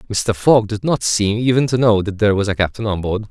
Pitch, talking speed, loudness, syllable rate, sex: 110 Hz, 270 wpm, -17 LUFS, 5.8 syllables/s, male